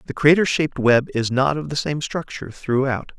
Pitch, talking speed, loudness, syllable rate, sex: 140 Hz, 205 wpm, -20 LUFS, 5.4 syllables/s, male